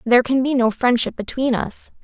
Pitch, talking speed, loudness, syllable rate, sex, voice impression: 245 Hz, 205 wpm, -19 LUFS, 5.5 syllables/s, female, feminine, slightly young, slightly clear, slightly fluent, cute, refreshing, friendly